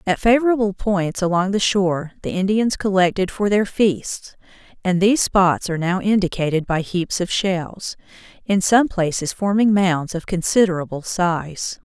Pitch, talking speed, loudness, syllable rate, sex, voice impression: 190 Hz, 150 wpm, -19 LUFS, 4.6 syllables/s, female, feminine, adult-like, slightly relaxed, powerful, soft, fluent, intellectual, calm, slightly friendly, elegant, lively, slightly sharp